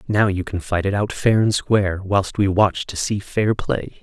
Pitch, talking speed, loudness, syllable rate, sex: 100 Hz, 240 wpm, -20 LUFS, 4.5 syllables/s, male